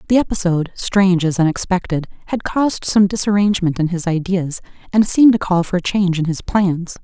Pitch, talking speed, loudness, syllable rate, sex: 185 Hz, 170 wpm, -17 LUFS, 5.9 syllables/s, female